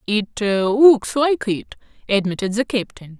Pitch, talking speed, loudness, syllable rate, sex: 220 Hz, 130 wpm, -18 LUFS, 3.9 syllables/s, female